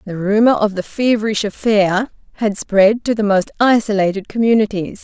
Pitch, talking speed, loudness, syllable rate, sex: 210 Hz, 155 wpm, -16 LUFS, 5.2 syllables/s, female